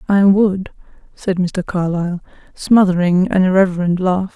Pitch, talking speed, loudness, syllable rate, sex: 185 Hz, 125 wpm, -16 LUFS, 4.7 syllables/s, female